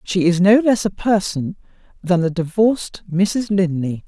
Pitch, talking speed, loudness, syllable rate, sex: 190 Hz, 160 wpm, -18 LUFS, 4.4 syllables/s, female